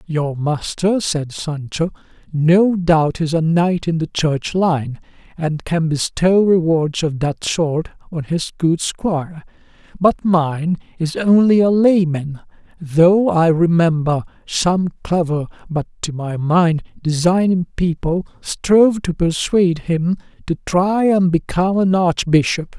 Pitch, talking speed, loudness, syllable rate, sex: 170 Hz, 135 wpm, -17 LUFS, 3.8 syllables/s, male